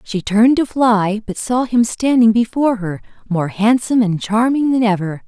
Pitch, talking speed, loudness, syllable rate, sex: 220 Hz, 180 wpm, -16 LUFS, 4.9 syllables/s, female